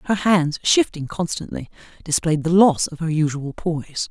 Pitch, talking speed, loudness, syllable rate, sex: 165 Hz, 160 wpm, -20 LUFS, 4.8 syllables/s, female